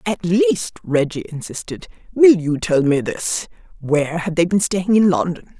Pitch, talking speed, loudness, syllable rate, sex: 175 Hz, 170 wpm, -18 LUFS, 4.4 syllables/s, female